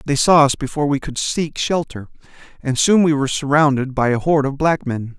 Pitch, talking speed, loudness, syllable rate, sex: 140 Hz, 220 wpm, -17 LUFS, 5.7 syllables/s, male